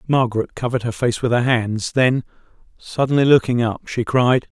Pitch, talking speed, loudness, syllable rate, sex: 120 Hz, 170 wpm, -19 LUFS, 5.2 syllables/s, male